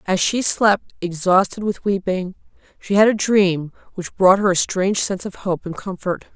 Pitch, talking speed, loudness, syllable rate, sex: 190 Hz, 190 wpm, -19 LUFS, 4.8 syllables/s, female